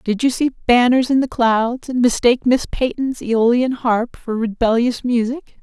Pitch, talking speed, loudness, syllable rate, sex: 245 Hz, 170 wpm, -17 LUFS, 4.5 syllables/s, female